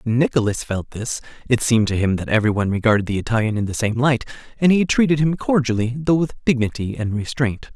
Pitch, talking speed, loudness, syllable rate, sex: 120 Hz, 200 wpm, -20 LUFS, 6.0 syllables/s, male